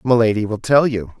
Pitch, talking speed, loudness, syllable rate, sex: 115 Hz, 200 wpm, -17 LUFS, 5.7 syllables/s, male